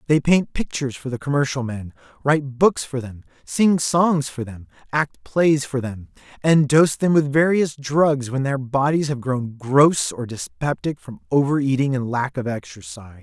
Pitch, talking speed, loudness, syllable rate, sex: 135 Hz, 175 wpm, -20 LUFS, 4.6 syllables/s, male